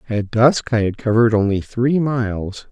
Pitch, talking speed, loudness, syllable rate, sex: 115 Hz, 175 wpm, -18 LUFS, 4.8 syllables/s, male